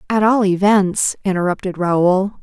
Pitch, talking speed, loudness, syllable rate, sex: 190 Hz, 125 wpm, -16 LUFS, 4.4 syllables/s, female